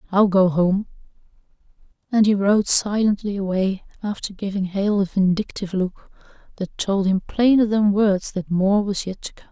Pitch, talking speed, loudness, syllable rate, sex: 200 Hz, 165 wpm, -20 LUFS, 4.8 syllables/s, female